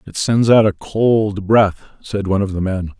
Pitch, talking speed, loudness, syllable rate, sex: 100 Hz, 220 wpm, -16 LUFS, 4.7 syllables/s, male